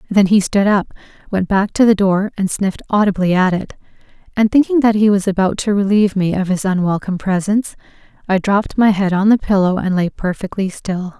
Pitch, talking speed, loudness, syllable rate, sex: 195 Hz, 205 wpm, -16 LUFS, 5.8 syllables/s, female